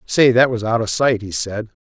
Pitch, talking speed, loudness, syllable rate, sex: 115 Hz, 260 wpm, -17 LUFS, 5.0 syllables/s, male